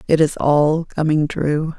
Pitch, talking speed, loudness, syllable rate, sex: 155 Hz, 170 wpm, -18 LUFS, 3.7 syllables/s, female